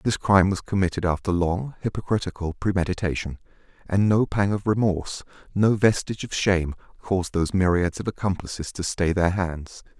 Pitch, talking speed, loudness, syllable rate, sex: 95 Hz, 155 wpm, -24 LUFS, 5.7 syllables/s, male